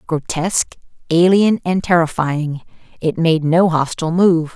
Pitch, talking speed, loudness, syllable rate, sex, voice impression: 165 Hz, 120 wpm, -16 LUFS, 4.6 syllables/s, female, feminine, very adult-like, slightly clear, slightly fluent, slightly calm